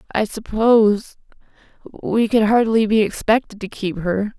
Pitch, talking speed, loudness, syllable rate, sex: 215 Hz, 125 wpm, -18 LUFS, 4.3 syllables/s, female